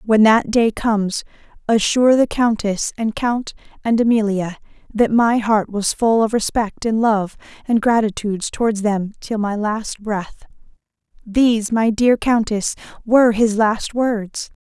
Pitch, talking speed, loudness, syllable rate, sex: 220 Hz, 150 wpm, -18 LUFS, 4.2 syllables/s, female